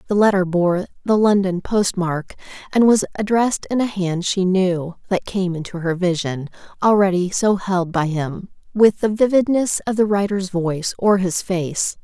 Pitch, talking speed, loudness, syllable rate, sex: 190 Hz, 165 wpm, -19 LUFS, 4.6 syllables/s, female